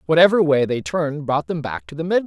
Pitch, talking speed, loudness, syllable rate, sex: 150 Hz, 265 wpm, -19 LUFS, 6.5 syllables/s, male